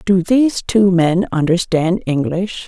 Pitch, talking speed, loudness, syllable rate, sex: 185 Hz, 135 wpm, -15 LUFS, 3.9 syllables/s, female